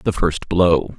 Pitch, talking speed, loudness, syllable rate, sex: 85 Hz, 180 wpm, -18 LUFS, 3.2 syllables/s, male